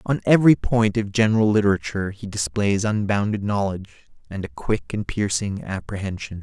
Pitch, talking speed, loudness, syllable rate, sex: 105 Hz, 150 wpm, -22 LUFS, 5.6 syllables/s, male